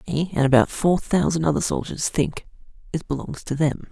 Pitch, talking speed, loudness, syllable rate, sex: 145 Hz, 185 wpm, -22 LUFS, 5.2 syllables/s, male